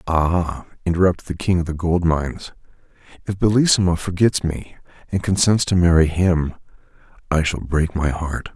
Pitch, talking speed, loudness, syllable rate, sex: 85 Hz, 155 wpm, -19 LUFS, 4.9 syllables/s, male